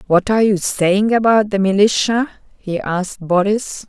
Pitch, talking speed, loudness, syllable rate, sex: 200 Hz, 155 wpm, -16 LUFS, 4.7 syllables/s, female